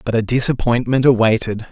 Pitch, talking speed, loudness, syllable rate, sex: 120 Hz, 140 wpm, -16 LUFS, 5.7 syllables/s, male